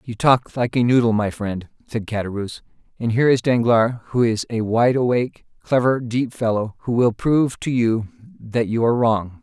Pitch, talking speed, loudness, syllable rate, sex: 120 Hz, 190 wpm, -20 LUFS, 5.1 syllables/s, male